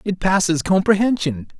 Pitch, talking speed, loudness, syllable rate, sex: 180 Hz, 115 wpm, -18 LUFS, 5.0 syllables/s, male